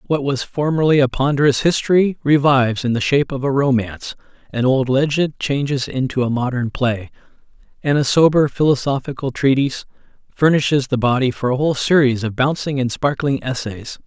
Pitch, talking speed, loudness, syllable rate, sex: 135 Hz, 155 wpm, -17 LUFS, 5.6 syllables/s, male